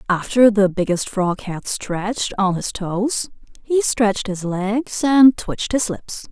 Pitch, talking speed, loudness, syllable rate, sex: 210 Hz, 160 wpm, -19 LUFS, 3.8 syllables/s, female